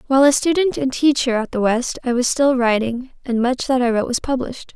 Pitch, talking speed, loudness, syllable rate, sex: 255 Hz, 240 wpm, -18 LUFS, 5.9 syllables/s, female